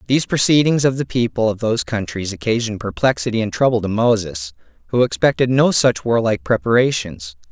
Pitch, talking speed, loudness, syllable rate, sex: 110 Hz, 160 wpm, -18 LUFS, 6.0 syllables/s, male